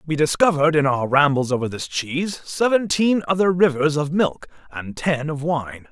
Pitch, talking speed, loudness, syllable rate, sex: 155 Hz, 170 wpm, -20 LUFS, 5.0 syllables/s, male